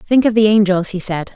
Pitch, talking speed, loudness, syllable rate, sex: 200 Hz, 265 wpm, -15 LUFS, 5.3 syllables/s, female